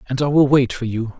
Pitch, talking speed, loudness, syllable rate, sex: 130 Hz, 300 wpm, -17 LUFS, 6.1 syllables/s, male